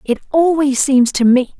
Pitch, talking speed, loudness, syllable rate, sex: 270 Hz, 190 wpm, -14 LUFS, 4.5 syllables/s, female